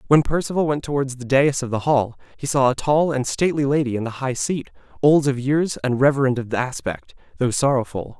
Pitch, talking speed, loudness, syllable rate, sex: 135 Hz, 210 wpm, -21 LUFS, 5.6 syllables/s, male